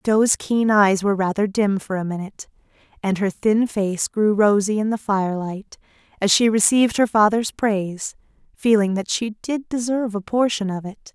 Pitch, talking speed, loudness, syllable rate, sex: 210 Hz, 180 wpm, -20 LUFS, 4.9 syllables/s, female